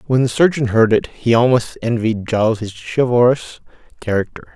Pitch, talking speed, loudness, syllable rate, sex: 120 Hz, 160 wpm, -16 LUFS, 5.4 syllables/s, male